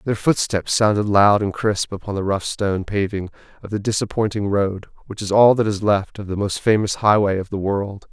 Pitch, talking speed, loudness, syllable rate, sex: 100 Hz, 215 wpm, -19 LUFS, 5.3 syllables/s, male